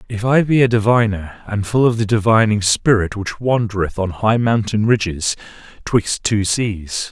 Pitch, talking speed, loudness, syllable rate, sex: 110 Hz, 170 wpm, -17 LUFS, 4.6 syllables/s, male